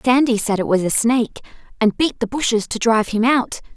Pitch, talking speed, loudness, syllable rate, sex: 230 Hz, 225 wpm, -18 LUFS, 5.8 syllables/s, female